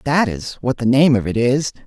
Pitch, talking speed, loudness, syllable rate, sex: 125 Hz, 255 wpm, -17 LUFS, 5.0 syllables/s, male